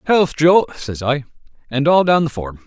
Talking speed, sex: 200 wpm, male